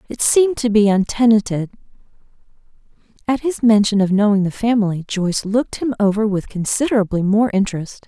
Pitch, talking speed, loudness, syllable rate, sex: 215 Hz, 150 wpm, -17 LUFS, 5.9 syllables/s, female